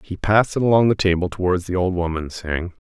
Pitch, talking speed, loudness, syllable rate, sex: 95 Hz, 230 wpm, -20 LUFS, 6.0 syllables/s, male